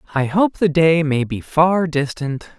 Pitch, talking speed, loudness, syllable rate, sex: 155 Hz, 185 wpm, -18 LUFS, 4.0 syllables/s, male